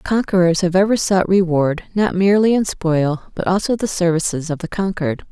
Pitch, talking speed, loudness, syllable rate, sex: 180 Hz, 180 wpm, -17 LUFS, 5.4 syllables/s, female